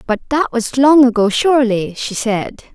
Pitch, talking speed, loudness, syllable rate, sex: 245 Hz, 175 wpm, -14 LUFS, 4.6 syllables/s, female